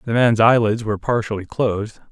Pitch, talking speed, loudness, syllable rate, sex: 110 Hz, 170 wpm, -18 LUFS, 5.8 syllables/s, male